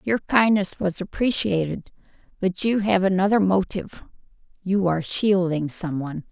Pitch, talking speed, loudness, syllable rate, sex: 185 Hz, 115 wpm, -22 LUFS, 4.9 syllables/s, female